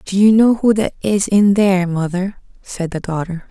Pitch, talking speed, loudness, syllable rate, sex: 190 Hz, 205 wpm, -16 LUFS, 4.8 syllables/s, female